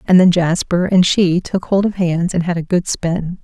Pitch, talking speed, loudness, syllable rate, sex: 180 Hz, 245 wpm, -16 LUFS, 4.6 syllables/s, female